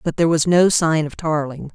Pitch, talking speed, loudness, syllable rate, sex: 160 Hz, 240 wpm, -17 LUFS, 5.5 syllables/s, female